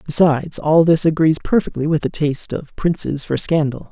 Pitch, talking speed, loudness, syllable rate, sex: 155 Hz, 185 wpm, -17 LUFS, 5.4 syllables/s, male